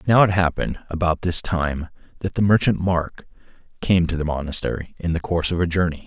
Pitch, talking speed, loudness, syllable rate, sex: 85 Hz, 200 wpm, -21 LUFS, 5.8 syllables/s, male